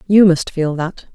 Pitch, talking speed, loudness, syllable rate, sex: 175 Hz, 210 wpm, -16 LUFS, 4.1 syllables/s, female